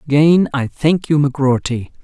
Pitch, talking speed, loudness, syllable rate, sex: 145 Hz, 145 wpm, -15 LUFS, 5.2 syllables/s, female